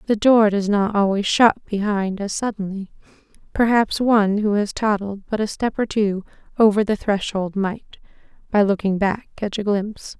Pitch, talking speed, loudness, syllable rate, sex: 205 Hz, 170 wpm, -20 LUFS, 4.8 syllables/s, female